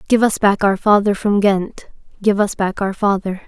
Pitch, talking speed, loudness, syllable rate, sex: 200 Hz, 205 wpm, -16 LUFS, 4.7 syllables/s, female